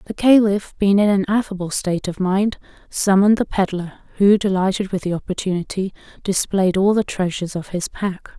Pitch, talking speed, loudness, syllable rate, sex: 195 Hz, 170 wpm, -19 LUFS, 5.5 syllables/s, female